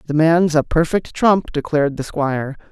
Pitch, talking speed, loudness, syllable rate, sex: 155 Hz, 175 wpm, -18 LUFS, 5.0 syllables/s, male